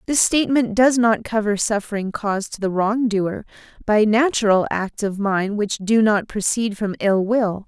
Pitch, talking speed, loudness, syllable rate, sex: 215 Hz, 180 wpm, -19 LUFS, 4.6 syllables/s, female